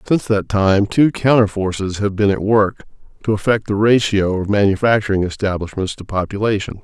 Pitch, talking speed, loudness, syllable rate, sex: 100 Hz, 165 wpm, -17 LUFS, 5.4 syllables/s, male